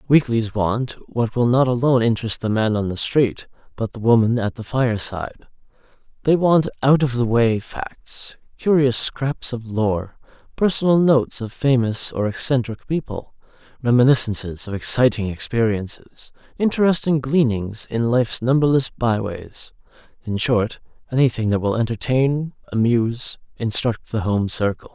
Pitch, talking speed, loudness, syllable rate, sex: 120 Hz, 140 wpm, -20 LUFS, 4.7 syllables/s, male